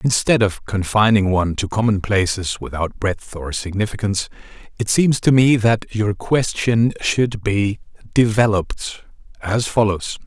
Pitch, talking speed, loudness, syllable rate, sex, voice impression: 105 Hz, 135 wpm, -18 LUFS, 4.4 syllables/s, male, very masculine, very middle-aged, very thick, tensed, very powerful, bright, soft, clear, fluent, slightly raspy, very cool, intellectual, slightly refreshing, sincere, very calm, mature, very friendly, very reassuring, unique, slightly elegant, wild, slightly sweet, lively, kind, slightly modest